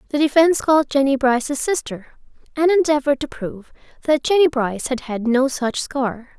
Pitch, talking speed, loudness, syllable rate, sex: 275 Hz, 170 wpm, -19 LUFS, 5.6 syllables/s, female